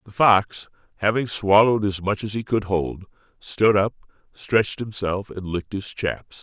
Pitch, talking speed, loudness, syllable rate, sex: 100 Hz, 170 wpm, -22 LUFS, 4.6 syllables/s, male